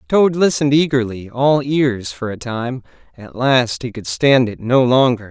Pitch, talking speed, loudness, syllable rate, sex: 125 Hz, 180 wpm, -16 LUFS, 4.4 syllables/s, male